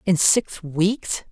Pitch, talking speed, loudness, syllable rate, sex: 185 Hz, 135 wpm, -21 LUFS, 2.6 syllables/s, female